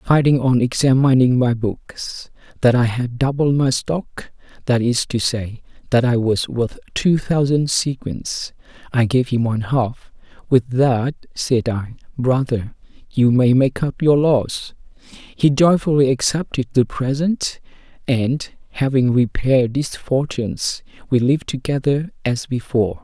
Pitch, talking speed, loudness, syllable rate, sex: 130 Hz, 140 wpm, -18 LUFS, 4.1 syllables/s, male